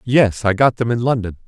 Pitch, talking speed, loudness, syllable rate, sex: 115 Hz, 245 wpm, -17 LUFS, 5.4 syllables/s, male